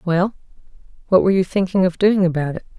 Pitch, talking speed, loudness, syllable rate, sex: 185 Hz, 170 wpm, -18 LUFS, 6.6 syllables/s, female